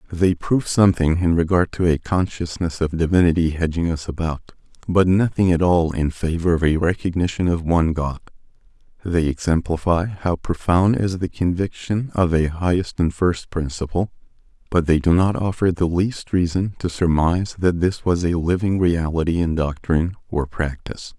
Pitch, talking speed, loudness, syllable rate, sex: 85 Hz, 165 wpm, -20 LUFS, 5.0 syllables/s, male